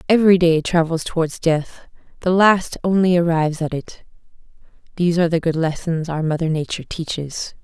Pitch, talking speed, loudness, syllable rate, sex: 165 Hz, 155 wpm, -19 LUFS, 5.6 syllables/s, female